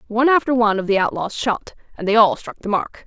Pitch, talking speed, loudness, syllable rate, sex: 215 Hz, 255 wpm, -19 LUFS, 6.4 syllables/s, female